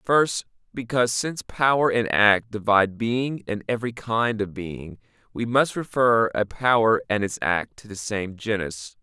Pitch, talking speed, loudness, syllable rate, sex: 110 Hz, 165 wpm, -23 LUFS, 4.4 syllables/s, male